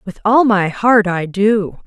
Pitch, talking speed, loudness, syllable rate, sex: 205 Hz, 195 wpm, -14 LUFS, 3.7 syllables/s, female